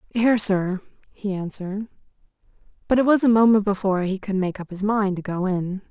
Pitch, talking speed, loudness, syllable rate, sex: 200 Hz, 195 wpm, -22 LUFS, 5.8 syllables/s, female